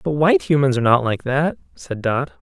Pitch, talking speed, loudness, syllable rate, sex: 130 Hz, 220 wpm, -18 LUFS, 5.6 syllables/s, male